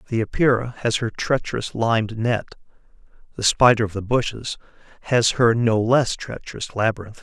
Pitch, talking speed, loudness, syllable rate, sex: 115 Hz, 150 wpm, -21 LUFS, 5.1 syllables/s, male